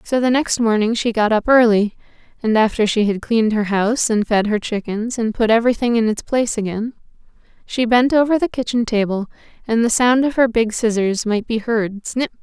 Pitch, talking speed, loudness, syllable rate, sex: 225 Hz, 210 wpm, -17 LUFS, 5.5 syllables/s, female